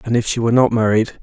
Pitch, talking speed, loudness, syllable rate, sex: 115 Hz, 295 wpm, -16 LUFS, 7.1 syllables/s, male